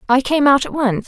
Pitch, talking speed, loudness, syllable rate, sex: 265 Hz, 280 wpm, -15 LUFS, 5.6 syllables/s, female